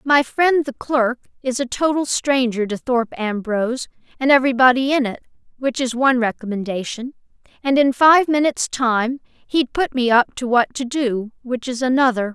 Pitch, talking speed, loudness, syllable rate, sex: 250 Hz, 170 wpm, -19 LUFS, 4.4 syllables/s, female